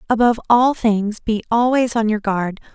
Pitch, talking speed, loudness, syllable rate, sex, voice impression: 225 Hz, 175 wpm, -18 LUFS, 5.0 syllables/s, female, very feminine, slightly adult-like, slightly cute, friendly, kind